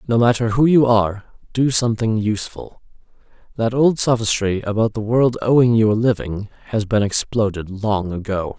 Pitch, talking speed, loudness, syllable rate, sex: 110 Hz, 160 wpm, -18 LUFS, 5.2 syllables/s, male